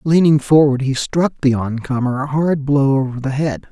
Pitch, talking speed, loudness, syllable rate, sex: 140 Hz, 195 wpm, -16 LUFS, 4.9 syllables/s, male